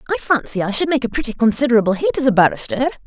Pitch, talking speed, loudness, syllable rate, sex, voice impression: 245 Hz, 235 wpm, -17 LUFS, 7.6 syllables/s, female, feminine, slightly adult-like, weak, slightly halting, slightly friendly, reassuring, modest